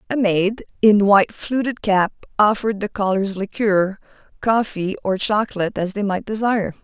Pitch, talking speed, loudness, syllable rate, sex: 205 Hz, 150 wpm, -19 LUFS, 5.1 syllables/s, female